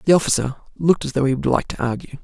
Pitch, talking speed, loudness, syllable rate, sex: 145 Hz, 270 wpm, -20 LUFS, 7.5 syllables/s, male